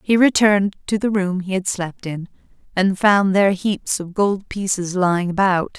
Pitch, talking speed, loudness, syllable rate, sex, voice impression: 190 Hz, 185 wpm, -19 LUFS, 4.7 syllables/s, female, feminine, adult-like, slightly clear, slightly intellectual, slightly strict